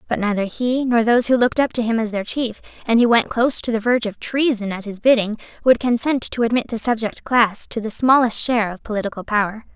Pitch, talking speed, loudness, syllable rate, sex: 230 Hz, 240 wpm, -19 LUFS, 6.1 syllables/s, female